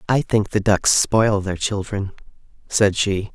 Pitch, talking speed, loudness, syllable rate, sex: 100 Hz, 160 wpm, -19 LUFS, 3.8 syllables/s, male